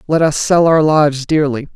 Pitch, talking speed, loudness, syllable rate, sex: 150 Hz, 205 wpm, -13 LUFS, 5.2 syllables/s, female